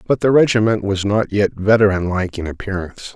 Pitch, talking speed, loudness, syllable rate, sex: 100 Hz, 170 wpm, -17 LUFS, 6.1 syllables/s, male